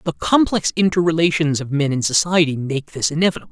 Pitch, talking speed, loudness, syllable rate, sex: 160 Hz, 170 wpm, -18 LUFS, 6.3 syllables/s, male